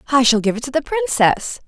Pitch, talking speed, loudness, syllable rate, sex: 265 Hz, 250 wpm, -17 LUFS, 5.9 syllables/s, female